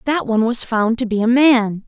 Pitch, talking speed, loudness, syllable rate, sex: 235 Hz, 255 wpm, -16 LUFS, 5.2 syllables/s, female